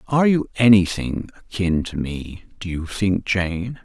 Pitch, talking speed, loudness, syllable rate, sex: 95 Hz, 155 wpm, -20 LUFS, 4.3 syllables/s, male